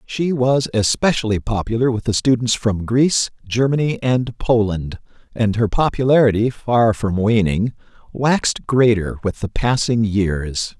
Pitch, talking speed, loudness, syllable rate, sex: 115 Hz, 135 wpm, -18 LUFS, 4.3 syllables/s, male